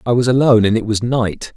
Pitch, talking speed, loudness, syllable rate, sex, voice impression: 115 Hz, 270 wpm, -15 LUFS, 6.3 syllables/s, male, masculine, adult-like, slightly cool, slightly refreshing, sincere